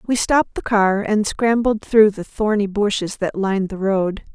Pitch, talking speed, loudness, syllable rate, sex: 205 Hz, 195 wpm, -18 LUFS, 4.6 syllables/s, female